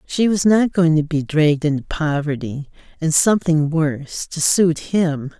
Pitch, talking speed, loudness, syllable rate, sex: 160 Hz, 165 wpm, -18 LUFS, 4.4 syllables/s, female